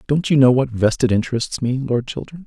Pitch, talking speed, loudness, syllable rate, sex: 130 Hz, 220 wpm, -18 LUFS, 5.6 syllables/s, male